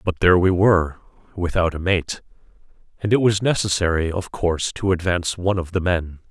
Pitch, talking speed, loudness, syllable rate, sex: 90 Hz, 180 wpm, -20 LUFS, 5.8 syllables/s, male